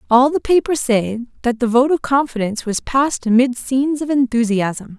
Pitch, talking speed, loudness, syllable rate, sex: 250 Hz, 180 wpm, -17 LUFS, 5.3 syllables/s, female